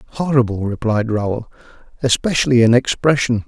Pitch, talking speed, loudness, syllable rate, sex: 120 Hz, 105 wpm, -17 LUFS, 4.8 syllables/s, male